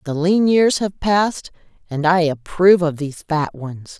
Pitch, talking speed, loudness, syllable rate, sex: 170 Hz, 180 wpm, -17 LUFS, 4.6 syllables/s, female